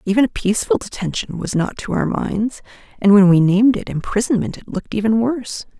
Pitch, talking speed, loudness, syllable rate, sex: 210 Hz, 195 wpm, -18 LUFS, 6.0 syllables/s, female